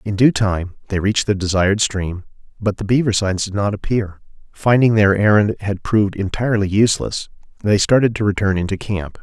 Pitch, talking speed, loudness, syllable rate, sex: 100 Hz, 180 wpm, -18 LUFS, 5.6 syllables/s, male